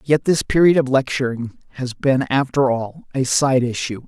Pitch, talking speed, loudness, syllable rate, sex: 130 Hz, 175 wpm, -18 LUFS, 4.6 syllables/s, male